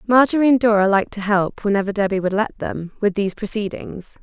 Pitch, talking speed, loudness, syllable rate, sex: 205 Hz, 200 wpm, -19 LUFS, 5.9 syllables/s, female